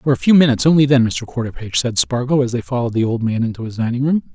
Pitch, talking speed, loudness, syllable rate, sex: 125 Hz, 275 wpm, -17 LUFS, 7.3 syllables/s, male